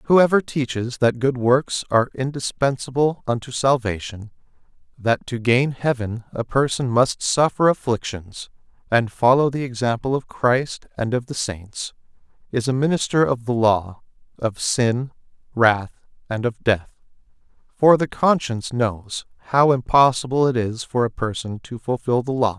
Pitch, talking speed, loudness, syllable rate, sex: 125 Hz, 145 wpm, -21 LUFS, 4.4 syllables/s, male